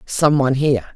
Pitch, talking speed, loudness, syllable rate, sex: 135 Hz, 190 wpm, -17 LUFS, 6.6 syllables/s, female